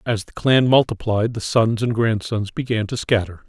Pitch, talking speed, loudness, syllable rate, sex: 110 Hz, 190 wpm, -20 LUFS, 4.8 syllables/s, male